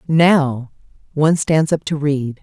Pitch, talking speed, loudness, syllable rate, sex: 150 Hz, 150 wpm, -16 LUFS, 3.8 syllables/s, female